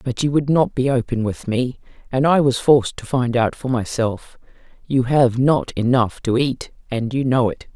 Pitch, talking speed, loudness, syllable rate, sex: 130 Hz, 210 wpm, -19 LUFS, 4.6 syllables/s, female